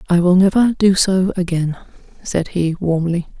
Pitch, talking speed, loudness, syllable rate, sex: 180 Hz, 160 wpm, -16 LUFS, 4.6 syllables/s, female